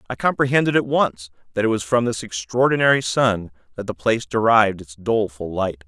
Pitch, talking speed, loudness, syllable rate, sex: 110 Hz, 185 wpm, -20 LUFS, 5.8 syllables/s, male